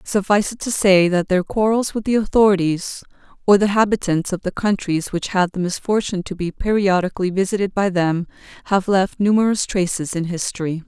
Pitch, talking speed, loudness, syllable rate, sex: 190 Hz, 175 wpm, -19 LUFS, 5.7 syllables/s, female